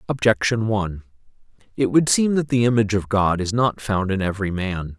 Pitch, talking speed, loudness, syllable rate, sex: 105 Hz, 195 wpm, -20 LUFS, 5.6 syllables/s, male